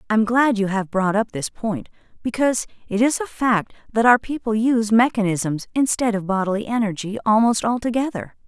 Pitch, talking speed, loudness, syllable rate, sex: 220 Hz, 175 wpm, -20 LUFS, 5.5 syllables/s, female